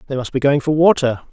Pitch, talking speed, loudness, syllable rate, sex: 140 Hz, 275 wpm, -16 LUFS, 6.4 syllables/s, male